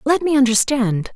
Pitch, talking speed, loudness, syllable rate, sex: 255 Hz, 155 wpm, -17 LUFS, 4.8 syllables/s, female